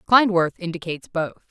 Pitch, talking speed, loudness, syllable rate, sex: 180 Hz, 120 wpm, -22 LUFS, 5.2 syllables/s, female